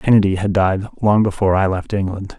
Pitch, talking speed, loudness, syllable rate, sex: 100 Hz, 200 wpm, -17 LUFS, 5.9 syllables/s, male